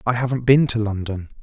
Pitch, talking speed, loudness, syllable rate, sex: 115 Hz, 210 wpm, -19 LUFS, 5.9 syllables/s, male